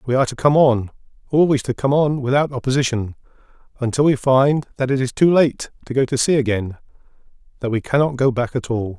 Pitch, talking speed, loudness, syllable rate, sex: 130 Hz, 205 wpm, -18 LUFS, 5.9 syllables/s, male